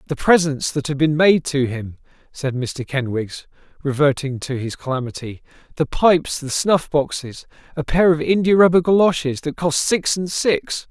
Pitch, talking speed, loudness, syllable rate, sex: 150 Hz, 165 wpm, -19 LUFS, 4.7 syllables/s, male